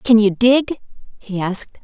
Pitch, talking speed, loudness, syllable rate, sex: 220 Hz, 165 wpm, -16 LUFS, 4.6 syllables/s, female